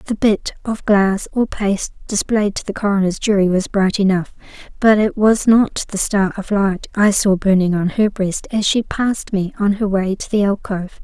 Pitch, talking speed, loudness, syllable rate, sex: 200 Hz, 205 wpm, -17 LUFS, 4.9 syllables/s, female